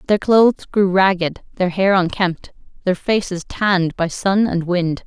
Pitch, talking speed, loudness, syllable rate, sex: 185 Hz, 165 wpm, -17 LUFS, 4.3 syllables/s, female